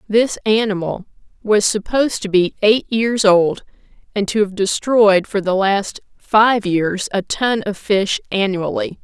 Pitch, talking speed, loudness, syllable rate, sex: 205 Hz, 155 wpm, -17 LUFS, 3.9 syllables/s, female